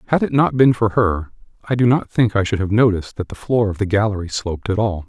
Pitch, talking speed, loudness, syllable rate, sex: 105 Hz, 270 wpm, -18 LUFS, 6.2 syllables/s, male